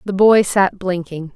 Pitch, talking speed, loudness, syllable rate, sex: 190 Hz, 175 wpm, -15 LUFS, 4.0 syllables/s, female